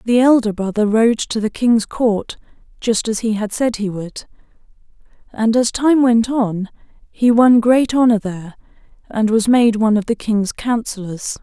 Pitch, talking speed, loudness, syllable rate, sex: 225 Hz, 175 wpm, -16 LUFS, 4.5 syllables/s, female